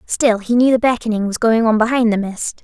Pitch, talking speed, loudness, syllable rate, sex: 225 Hz, 250 wpm, -16 LUFS, 5.6 syllables/s, female